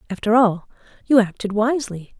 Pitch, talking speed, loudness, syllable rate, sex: 220 Hz, 135 wpm, -19 LUFS, 5.6 syllables/s, female